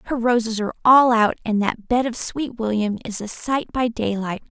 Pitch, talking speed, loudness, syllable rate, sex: 230 Hz, 210 wpm, -20 LUFS, 5.1 syllables/s, female